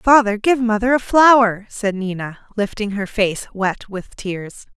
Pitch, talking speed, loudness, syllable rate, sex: 215 Hz, 165 wpm, -18 LUFS, 4.3 syllables/s, female